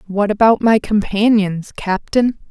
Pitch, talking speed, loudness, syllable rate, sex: 210 Hz, 120 wpm, -16 LUFS, 4.0 syllables/s, female